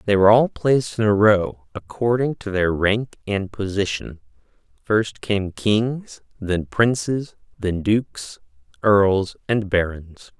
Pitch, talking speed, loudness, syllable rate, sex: 105 Hz, 135 wpm, -20 LUFS, 3.8 syllables/s, male